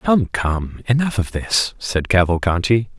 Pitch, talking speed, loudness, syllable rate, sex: 100 Hz, 140 wpm, -19 LUFS, 3.9 syllables/s, male